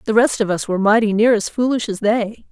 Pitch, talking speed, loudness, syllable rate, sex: 215 Hz, 260 wpm, -17 LUFS, 6.0 syllables/s, female